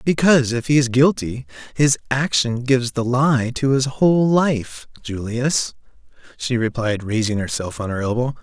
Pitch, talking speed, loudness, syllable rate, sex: 125 Hz, 155 wpm, -19 LUFS, 4.6 syllables/s, male